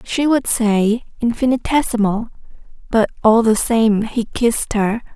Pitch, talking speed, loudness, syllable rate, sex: 225 Hz, 130 wpm, -17 LUFS, 4.2 syllables/s, female